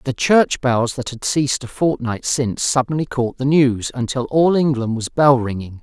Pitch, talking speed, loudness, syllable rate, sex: 130 Hz, 195 wpm, -18 LUFS, 4.8 syllables/s, male